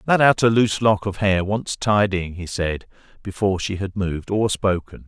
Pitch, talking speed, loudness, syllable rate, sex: 100 Hz, 190 wpm, -20 LUFS, 5.0 syllables/s, male